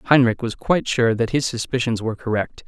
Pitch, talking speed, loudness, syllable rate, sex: 120 Hz, 200 wpm, -21 LUFS, 5.7 syllables/s, male